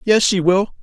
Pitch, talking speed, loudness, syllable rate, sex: 195 Hz, 220 wpm, -16 LUFS, 4.4 syllables/s, male